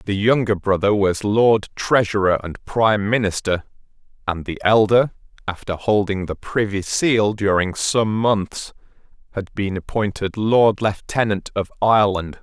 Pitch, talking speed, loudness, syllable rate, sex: 105 Hz, 130 wpm, -19 LUFS, 4.3 syllables/s, male